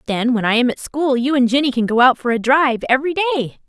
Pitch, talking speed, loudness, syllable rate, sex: 260 Hz, 275 wpm, -16 LUFS, 6.8 syllables/s, female